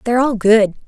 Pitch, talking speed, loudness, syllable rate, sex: 225 Hz, 205 wpm, -14 LUFS, 6.2 syllables/s, female